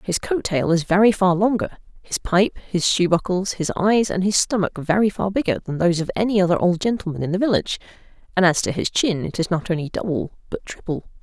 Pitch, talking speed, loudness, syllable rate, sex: 185 Hz, 210 wpm, -21 LUFS, 6.0 syllables/s, female